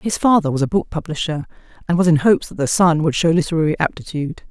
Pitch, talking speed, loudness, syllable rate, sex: 165 Hz, 225 wpm, -18 LUFS, 6.8 syllables/s, female